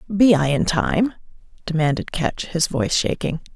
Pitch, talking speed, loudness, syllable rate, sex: 170 Hz, 150 wpm, -20 LUFS, 4.8 syllables/s, female